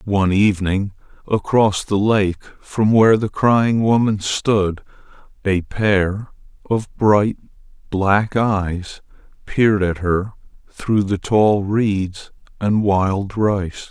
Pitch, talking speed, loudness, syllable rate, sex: 100 Hz, 115 wpm, -18 LUFS, 3.2 syllables/s, male